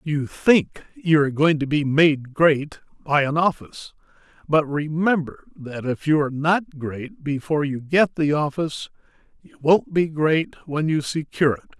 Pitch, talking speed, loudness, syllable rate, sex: 150 Hz, 170 wpm, -21 LUFS, 4.6 syllables/s, male